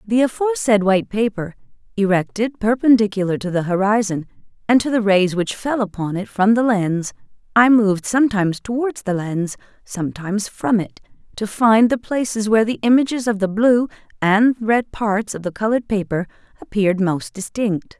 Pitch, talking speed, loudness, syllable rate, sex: 210 Hz, 165 wpm, -18 LUFS, 5.3 syllables/s, female